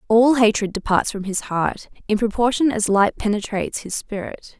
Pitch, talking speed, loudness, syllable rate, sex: 215 Hz, 170 wpm, -20 LUFS, 5.0 syllables/s, female